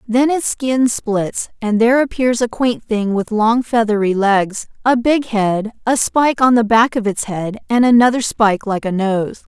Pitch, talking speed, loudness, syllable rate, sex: 225 Hz, 195 wpm, -16 LUFS, 4.4 syllables/s, female